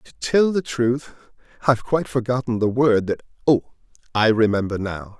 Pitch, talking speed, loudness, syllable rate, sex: 120 Hz, 150 wpm, -21 LUFS, 5.1 syllables/s, male